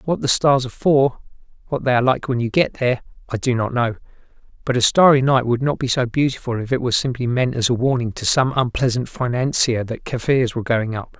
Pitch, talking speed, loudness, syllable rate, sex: 125 Hz, 230 wpm, -19 LUFS, 6.0 syllables/s, male